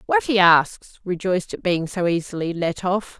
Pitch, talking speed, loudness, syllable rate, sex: 185 Hz, 190 wpm, -20 LUFS, 4.8 syllables/s, female